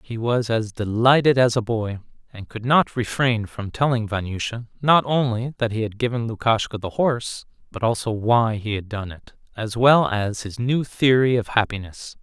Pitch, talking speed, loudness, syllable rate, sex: 115 Hz, 185 wpm, -21 LUFS, 4.8 syllables/s, male